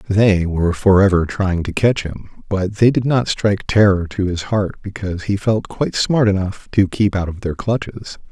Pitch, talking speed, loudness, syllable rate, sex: 100 Hz, 200 wpm, -17 LUFS, 4.9 syllables/s, male